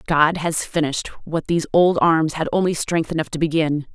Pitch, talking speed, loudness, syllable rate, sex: 160 Hz, 200 wpm, -20 LUFS, 5.4 syllables/s, female